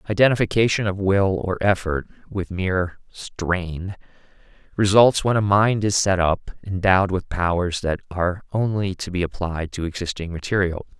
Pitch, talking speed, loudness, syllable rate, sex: 95 Hz, 145 wpm, -21 LUFS, 4.9 syllables/s, male